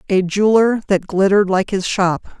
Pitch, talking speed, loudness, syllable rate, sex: 195 Hz, 175 wpm, -16 LUFS, 5.1 syllables/s, female